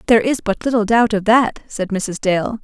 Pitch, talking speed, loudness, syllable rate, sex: 215 Hz, 230 wpm, -17 LUFS, 5.1 syllables/s, female